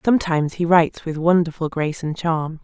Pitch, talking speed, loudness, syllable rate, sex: 165 Hz, 180 wpm, -20 LUFS, 5.9 syllables/s, female